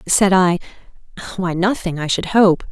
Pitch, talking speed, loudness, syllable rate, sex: 185 Hz, 155 wpm, -17 LUFS, 4.5 syllables/s, female